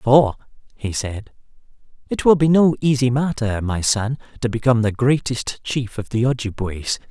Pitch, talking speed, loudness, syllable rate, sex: 120 Hz, 160 wpm, -20 LUFS, 4.7 syllables/s, male